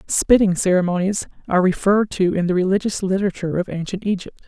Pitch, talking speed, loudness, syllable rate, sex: 190 Hz, 160 wpm, -19 LUFS, 6.6 syllables/s, female